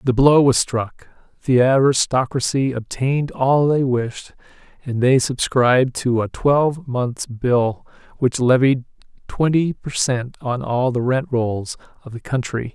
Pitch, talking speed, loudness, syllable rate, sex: 130 Hz, 140 wpm, -19 LUFS, 4.0 syllables/s, male